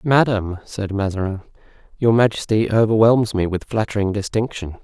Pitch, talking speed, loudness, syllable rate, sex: 105 Hz, 125 wpm, -19 LUFS, 5.3 syllables/s, male